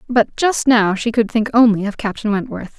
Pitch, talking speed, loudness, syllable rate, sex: 220 Hz, 215 wpm, -16 LUFS, 5.1 syllables/s, female